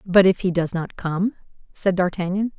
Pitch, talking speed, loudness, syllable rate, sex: 185 Hz, 185 wpm, -22 LUFS, 4.7 syllables/s, female